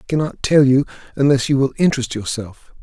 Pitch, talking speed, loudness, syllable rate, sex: 135 Hz, 190 wpm, -17 LUFS, 6.1 syllables/s, male